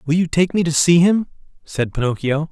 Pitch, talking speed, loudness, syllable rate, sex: 160 Hz, 215 wpm, -17 LUFS, 5.3 syllables/s, male